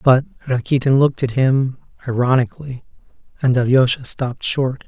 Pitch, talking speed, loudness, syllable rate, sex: 130 Hz, 125 wpm, -18 LUFS, 5.4 syllables/s, male